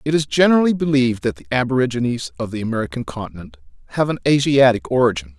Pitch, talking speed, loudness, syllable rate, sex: 125 Hz, 165 wpm, -18 LUFS, 6.9 syllables/s, male